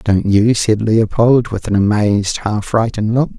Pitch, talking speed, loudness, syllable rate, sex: 110 Hz, 175 wpm, -14 LUFS, 4.7 syllables/s, male